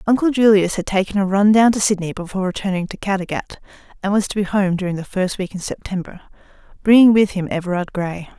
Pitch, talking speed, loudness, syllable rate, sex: 195 Hz, 210 wpm, -18 LUFS, 6.4 syllables/s, female